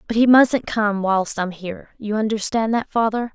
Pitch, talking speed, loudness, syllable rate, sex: 215 Hz, 195 wpm, -19 LUFS, 4.8 syllables/s, female